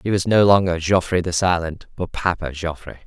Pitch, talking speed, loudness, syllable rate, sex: 90 Hz, 195 wpm, -19 LUFS, 5.4 syllables/s, male